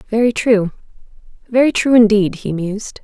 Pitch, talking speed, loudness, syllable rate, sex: 215 Hz, 140 wpm, -15 LUFS, 5.2 syllables/s, female